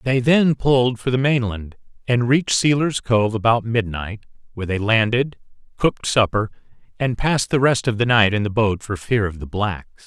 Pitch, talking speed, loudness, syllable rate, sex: 115 Hz, 190 wpm, -19 LUFS, 5.1 syllables/s, male